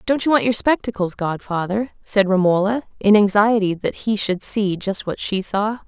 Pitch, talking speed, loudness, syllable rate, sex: 205 Hz, 185 wpm, -19 LUFS, 4.8 syllables/s, female